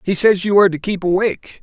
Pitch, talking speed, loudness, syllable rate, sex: 185 Hz, 260 wpm, -16 LUFS, 6.5 syllables/s, male